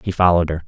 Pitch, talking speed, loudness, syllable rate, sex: 85 Hz, 265 wpm, -17 LUFS, 8.8 syllables/s, male